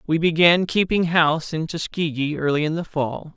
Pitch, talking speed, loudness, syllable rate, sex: 160 Hz, 180 wpm, -20 LUFS, 5.0 syllables/s, male